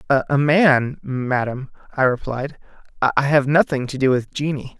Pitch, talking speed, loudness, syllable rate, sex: 135 Hz, 150 wpm, -19 LUFS, 4.3 syllables/s, male